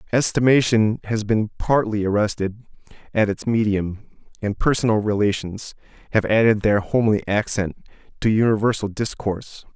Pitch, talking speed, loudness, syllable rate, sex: 105 Hz, 115 wpm, -21 LUFS, 5.1 syllables/s, male